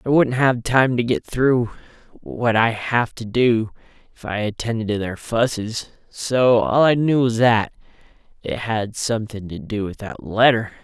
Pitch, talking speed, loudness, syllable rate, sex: 115 Hz, 175 wpm, -20 LUFS, 4.3 syllables/s, male